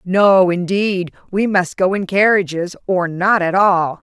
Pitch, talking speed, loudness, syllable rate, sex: 185 Hz, 160 wpm, -16 LUFS, 3.8 syllables/s, female